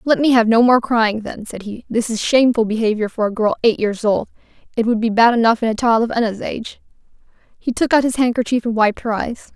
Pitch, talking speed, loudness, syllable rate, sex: 230 Hz, 245 wpm, -17 LUFS, 6.0 syllables/s, female